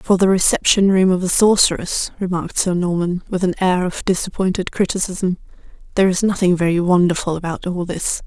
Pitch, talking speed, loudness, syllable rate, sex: 185 Hz, 175 wpm, -17 LUFS, 5.7 syllables/s, female